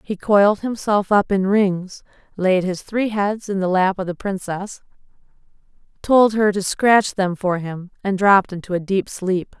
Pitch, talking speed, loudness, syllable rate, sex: 195 Hz, 180 wpm, -19 LUFS, 4.3 syllables/s, female